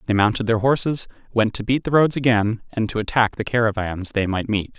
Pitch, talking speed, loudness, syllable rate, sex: 115 Hz, 225 wpm, -21 LUFS, 5.6 syllables/s, male